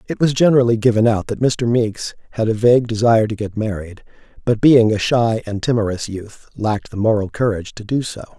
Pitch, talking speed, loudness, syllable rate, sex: 110 Hz, 210 wpm, -17 LUFS, 5.8 syllables/s, male